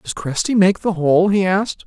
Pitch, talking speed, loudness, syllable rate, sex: 185 Hz, 225 wpm, -17 LUFS, 4.9 syllables/s, male